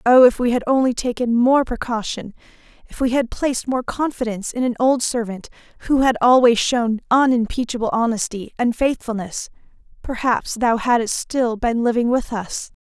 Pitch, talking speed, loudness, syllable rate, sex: 240 Hz, 160 wpm, -19 LUFS, 4.9 syllables/s, female